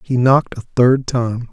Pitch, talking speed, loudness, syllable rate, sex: 125 Hz, 195 wpm, -16 LUFS, 4.3 syllables/s, male